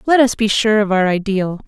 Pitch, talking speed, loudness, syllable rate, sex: 210 Hz, 250 wpm, -15 LUFS, 5.3 syllables/s, female